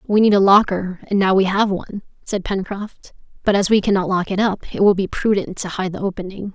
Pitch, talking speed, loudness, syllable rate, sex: 195 Hz, 240 wpm, -18 LUFS, 5.8 syllables/s, female